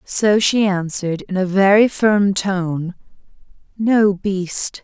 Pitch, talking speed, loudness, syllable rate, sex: 195 Hz, 125 wpm, -17 LUFS, 3.3 syllables/s, female